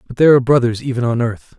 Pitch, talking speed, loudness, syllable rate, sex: 120 Hz, 265 wpm, -15 LUFS, 7.7 syllables/s, male